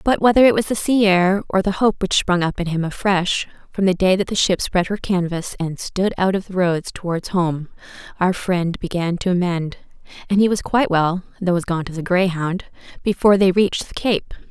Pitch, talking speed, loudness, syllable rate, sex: 185 Hz, 225 wpm, -19 LUFS, 4.9 syllables/s, female